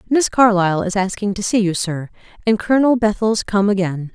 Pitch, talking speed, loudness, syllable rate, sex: 205 Hz, 190 wpm, -17 LUFS, 5.6 syllables/s, female